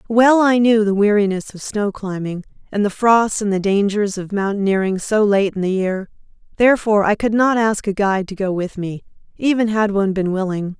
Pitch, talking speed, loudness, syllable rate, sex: 205 Hz, 205 wpm, -17 LUFS, 5.4 syllables/s, female